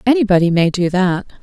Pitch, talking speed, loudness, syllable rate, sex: 195 Hz, 170 wpm, -15 LUFS, 5.8 syllables/s, female